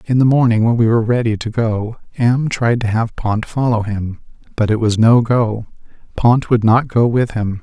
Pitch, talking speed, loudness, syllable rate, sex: 115 Hz, 215 wpm, -15 LUFS, 4.8 syllables/s, male